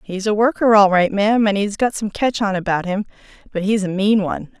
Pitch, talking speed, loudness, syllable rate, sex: 205 Hz, 250 wpm, -17 LUFS, 5.6 syllables/s, female